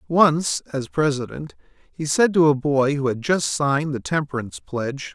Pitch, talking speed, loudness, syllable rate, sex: 145 Hz, 175 wpm, -21 LUFS, 4.9 syllables/s, male